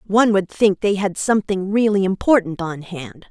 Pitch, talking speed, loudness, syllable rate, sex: 195 Hz, 180 wpm, -18 LUFS, 5.1 syllables/s, female